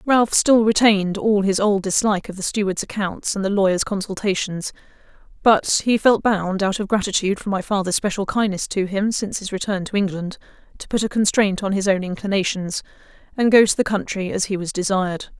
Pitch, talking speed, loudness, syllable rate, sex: 200 Hz, 200 wpm, -20 LUFS, 5.7 syllables/s, female